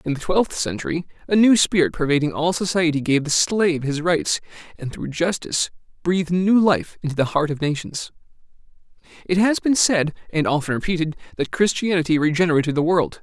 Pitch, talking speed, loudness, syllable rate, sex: 165 Hz, 170 wpm, -20 LUFS, 5.7 syllables/s, male